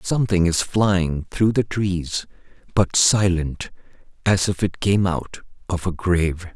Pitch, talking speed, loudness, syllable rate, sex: 90 Hz, 145 wpm, -21 LUFS, 3.9 syllables/s, male